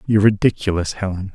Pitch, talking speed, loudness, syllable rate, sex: 100 Hz, 135 wpm, -19 LUFS, 6.6 syllables/s, male